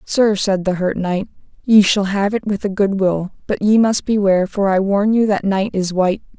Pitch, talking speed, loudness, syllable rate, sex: 200 Hz, 235 wpm, -17 LUFS, 4.8 syllables/s, female